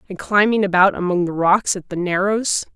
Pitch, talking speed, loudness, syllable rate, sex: 190 Hz, 195 wpm, -18 LUFS, 5.2 syllables/s, female